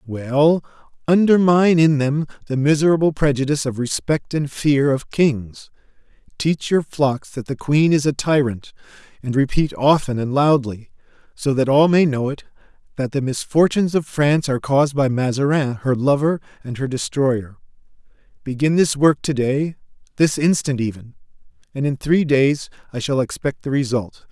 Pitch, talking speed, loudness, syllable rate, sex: 140 Hz, 160 wpm, -19 LUFS, 4.9 syllables/s, male